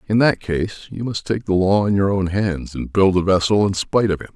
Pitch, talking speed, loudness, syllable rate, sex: 100 Hz, 275 wpm, -19 LUFS, 5.5 syllables/s, male